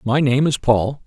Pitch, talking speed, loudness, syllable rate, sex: 130 Hz, 225 wpm, -17 LUFS, 4.3 syllables/s, male